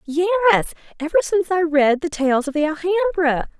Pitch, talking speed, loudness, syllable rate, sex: 305 Hz, 165 wpm, -19 LUFS, 4.7 syllables/s, female